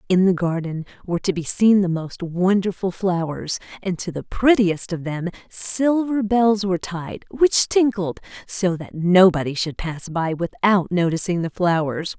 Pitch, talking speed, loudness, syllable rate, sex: 185 Hz, 165 wpm, -21 LUFS, 4.4 syllables/s, female